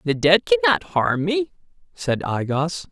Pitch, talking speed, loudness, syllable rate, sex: 150 Hz, 165 wpm, -20 LUFS, 4.0 syllables/s, male